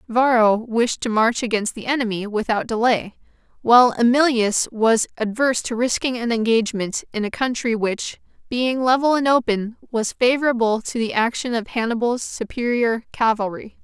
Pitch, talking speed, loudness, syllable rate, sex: 235 Hz, 145 wpm, -20 LUFS, 5.0 syllables/s, female